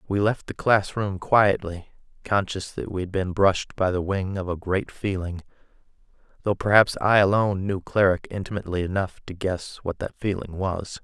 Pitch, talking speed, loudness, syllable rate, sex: 95 Hz, 175 wpm, -24 LUFS, 5.0 syllables/s, male